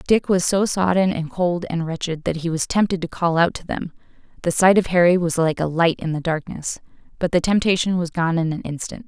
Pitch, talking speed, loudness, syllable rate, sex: 170 Hz, 225 wpm, -20 LUFS, 5.5 syllables/s, female